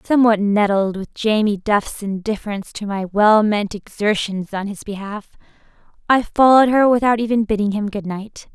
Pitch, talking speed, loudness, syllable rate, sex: 210 Hz, 160 wpm, -18 LUFS, 5.1 syllables/s, female